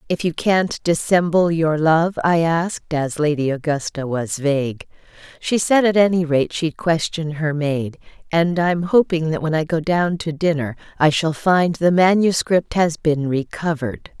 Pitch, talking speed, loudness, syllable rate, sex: 160 Hz, 170 wpm, -19 LUFS, 4.4 syllables/s, female